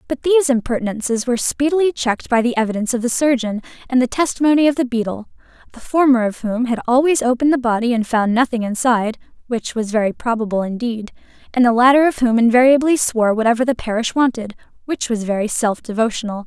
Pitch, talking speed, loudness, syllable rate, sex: 240 Hz, 190 wpm, -17 LUFS, 6.1 syllables/s, female